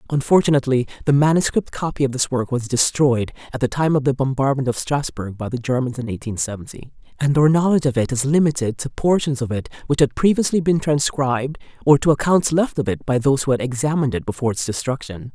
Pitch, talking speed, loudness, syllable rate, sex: 135 Hz, 210 wpm, -19 LUFS, 6.3 syllables/s, female